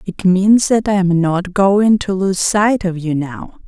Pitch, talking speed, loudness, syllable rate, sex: 190 Hz, 210 wpm, -14 LUFS, 3.7 syllables/s, female